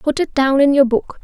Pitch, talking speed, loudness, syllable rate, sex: 275 Hz, 290 wpm, -15 LUFS, 5.1 syllables/s, female